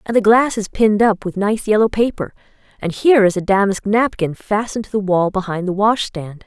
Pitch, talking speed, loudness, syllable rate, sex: 205 Hz, 215 wpm, -17 LUFS, 5.6 syllables/s, female